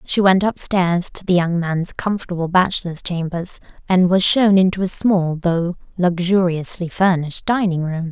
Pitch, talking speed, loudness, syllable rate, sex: 180 Hz, 155 wpm, -18 LUFS, 4.6 syllables/s, female